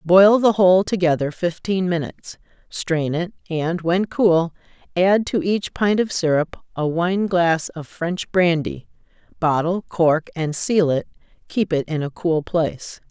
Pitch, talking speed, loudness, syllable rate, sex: 175 Hz, 145 wpm, -20 LUFS, 4.1 syllables/s, female